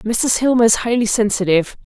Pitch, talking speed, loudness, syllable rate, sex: 225 Hz, 150 wpm, -16 LUFS, 5.7 syllables/s, female